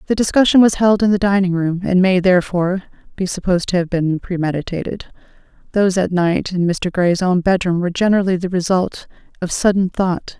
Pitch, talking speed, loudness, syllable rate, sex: 185 Hz, 185 wpm, -17 LUFS, 5.8 syllables/s, female